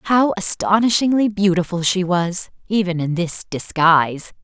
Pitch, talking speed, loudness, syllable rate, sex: 190 Hz, 120 wpm, -18 LUFS, 4.4 syllables/s, female